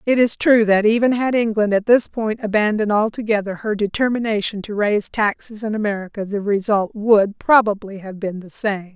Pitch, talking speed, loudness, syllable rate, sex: 210 Hz, 180 wpm, -19 LUFS, 5.3 syllables/s, female